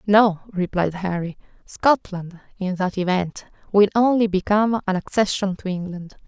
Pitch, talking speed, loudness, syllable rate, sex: 195 Hz, 135 wpm, -21 LUFS, 4.6 syllables/s, female